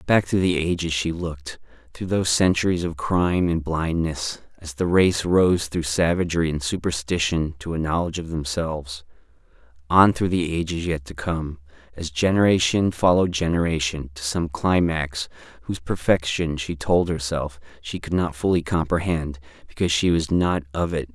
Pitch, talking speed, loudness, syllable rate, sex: 80 Hz, 160 wpm, -22 LUFS, 5.0 syllables/s, male